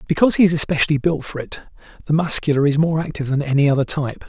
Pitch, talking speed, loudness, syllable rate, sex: 150 Hz, 225 wpm, -18 LUFS, 7.5 syllables/s, male